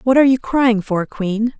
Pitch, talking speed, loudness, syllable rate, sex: 235 Hz, 225 wpm, -17 LUFS, 4.8 syllables/s, female